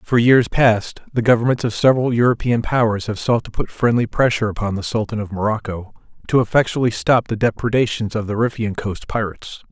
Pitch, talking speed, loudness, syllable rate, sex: 115 Hz, 185 wpm, -18 LUFS, 5.8 syllables/s, male